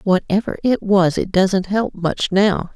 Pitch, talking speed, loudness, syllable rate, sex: 190 Hz, 175 wpm, -18 LUFS, 3.9 syllables/s, female